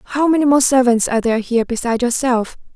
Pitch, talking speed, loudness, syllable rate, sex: 250 Hz, 195 wpm, -16 LUFS, 6.6 syllables/s, female